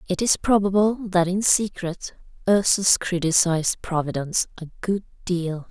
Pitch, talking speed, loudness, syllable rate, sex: 185 Hz, 125 wpm, -22 LUFS, 4.6 syllables/s, female